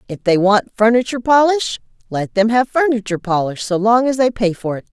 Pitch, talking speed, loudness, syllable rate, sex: 220 Hz, 205 wpm, -16 LUFS, 5.6 syllables/s, female